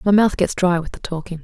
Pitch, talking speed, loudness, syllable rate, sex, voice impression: 180 Hz, 290 wpm, -19 LUFS, 6.0 syllables/s, female, feminine, slightly adult-like, intellectual, slightly calm, slightly strict, sharp, slightly modest